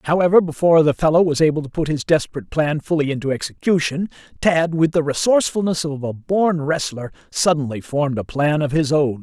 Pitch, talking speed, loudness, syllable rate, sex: 155 Hz, 190 wpm, -19 LUFS, 6.0 syllables/s, male